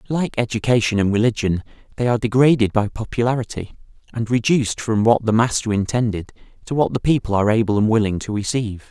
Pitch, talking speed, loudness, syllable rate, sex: 115 Hz, 175 wpm, -19 LUFS, 6.4 syllables/s, male